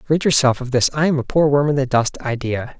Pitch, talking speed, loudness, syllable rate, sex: 135 Hz, 280 wpm, -18 LUFS, 5.9 syllables/s, male